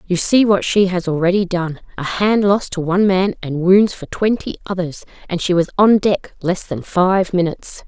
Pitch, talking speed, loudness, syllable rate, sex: 185 Hz, 190 wpm, -17 LUFS, 4.8 syllables/s, female